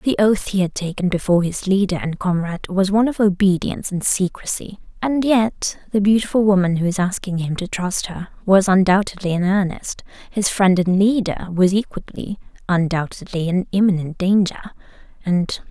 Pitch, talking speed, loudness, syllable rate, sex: 190 Hz, 165 wpm, -19 LUFS, 5.2 syllables/s, female